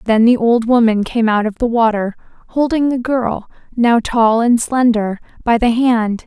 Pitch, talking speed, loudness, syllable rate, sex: 230 Hz, 180 wpm, -15 LUFS, 4.3 syllables/s, female